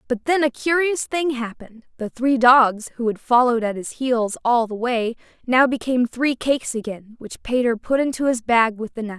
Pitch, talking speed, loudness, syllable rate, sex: 245 Hz, 210 wpm, -20 LUFS, 5.2 syllables/s, female